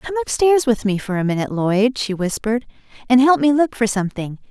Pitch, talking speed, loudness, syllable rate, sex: 235 Hz, 225 wpm, -18 LUFS, 7.1 syllables/s, female